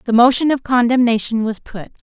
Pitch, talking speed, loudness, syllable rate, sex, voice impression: 240 Hz, 170 wpm, -15 LUFS, 5.7 syllables/s, female, very feminine, gender-neutral, slightly young, slightly adult-like, thin, very tensed, powerful, bright, very hard, very clear, very fluent, cute, intellectual, very refreshing, very sincere, very calm, very friendly, very reassuring, very unique, elegant, slightly wild, sweet, very lively, strict, intense, slightly sharp